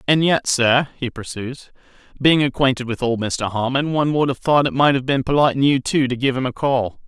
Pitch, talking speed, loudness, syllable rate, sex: 130 Hz, 235 wpm, -18 LUFS, 5.5 syllables/s, male